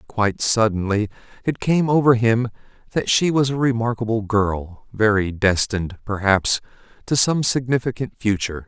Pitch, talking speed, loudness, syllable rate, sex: 110 Hz, 120 wpm, -20 LUFS, 4.9 syllables/s, male